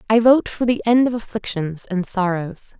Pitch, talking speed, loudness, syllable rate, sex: 210 Hz, 195 wpm, -19 LUFS, 4.7 syllables/s, female